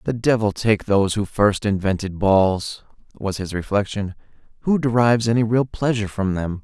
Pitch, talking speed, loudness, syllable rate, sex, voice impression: 105 Hz, 165 wpm, -20 LUFS, 5.1 syllables/s, male, masculine, adult-like, thick, tensed, powerful, slightly bright, clear, slightly nasal, cool, slightly mature, friendly, reassuring, wild, lively, slightly kind